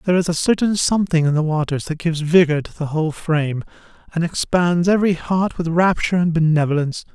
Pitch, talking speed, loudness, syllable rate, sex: 165 Hz, 195 wpm, -18 LUFS, 6.4 syllables/s, male